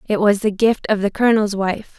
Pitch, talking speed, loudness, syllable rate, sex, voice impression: 205 Hz, 240 wpm, -18 LUFS, 5.4 syllables/s, female, feminine, slightly adult-like, slightly clear, refreshing, friendly